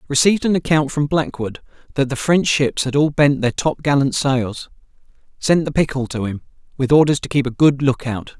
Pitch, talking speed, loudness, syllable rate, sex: 140 Hz, 205 wpm, -18 LUFS, 5.3 syllables/s, male